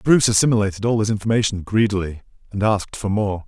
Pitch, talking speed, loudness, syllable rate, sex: 105 Hz, 155 wpm, -19 LUFS, 6.8 syllables/s, male